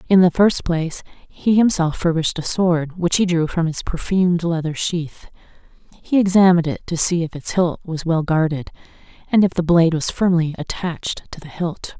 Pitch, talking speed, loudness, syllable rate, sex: 170 Hz, 190 wpm, -19 LUFS, 5.2 syllables/s, female